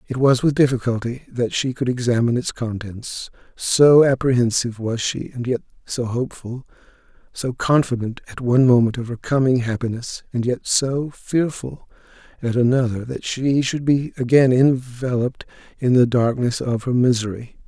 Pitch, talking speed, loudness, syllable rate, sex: 125 Hz, 155 wpm, -20 LUFS, 5.0 syllables/s, male